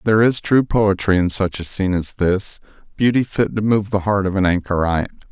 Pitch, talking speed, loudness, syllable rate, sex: 100 Hz, 215 wpm, -18 LUFS, 5.7 syllables/s, male